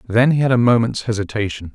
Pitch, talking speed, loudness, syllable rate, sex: 115 Hz, 205 wpm, -17 LUFS, 6.4 syllables/s, male